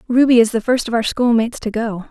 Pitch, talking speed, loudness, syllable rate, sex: 230 Hz, 255 wpm, -16 LUFS, 6.3 syllables/s, female